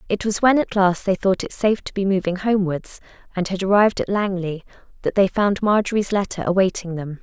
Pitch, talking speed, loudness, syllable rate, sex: 195 Hz, 210 wpm, -20 LUFS, 5.9 syllables/s, female